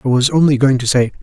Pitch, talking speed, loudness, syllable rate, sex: 130 Hz, 295 wpm, -13 LUFS, 6.7 syllables/s, male